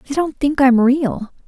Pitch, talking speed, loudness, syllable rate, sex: 270 Hz, 205 wpm, -16 LUFS, 4.3 syllables/s, female